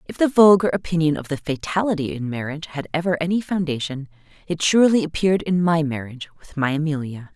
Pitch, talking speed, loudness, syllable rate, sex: 160 Hz, 180 wpm, -21 LUFS, 6.3 syllables/s, female